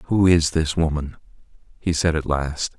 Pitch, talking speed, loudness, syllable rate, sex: 80 Hz, 170 wpm, -21 LUFS, 4.3 syllables/s, male